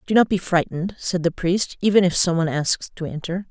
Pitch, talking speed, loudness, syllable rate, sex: 180 Hz, 240 wpm, -21 LUFS, 5.8 syllables/s, female